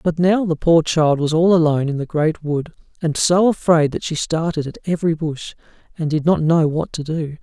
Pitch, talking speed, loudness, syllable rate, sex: 160 Hz, 225 wpm, -18 LUFS, 5.2 syllables/s, male